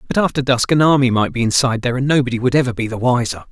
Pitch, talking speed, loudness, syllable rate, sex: 125 Hz, 275 wpm, -16 LUFS, 7.5 syllables/s, male